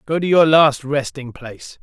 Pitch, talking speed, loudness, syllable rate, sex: 145 Hz, 200 wpm, -15 LUFS, 4.7 syllables/s, male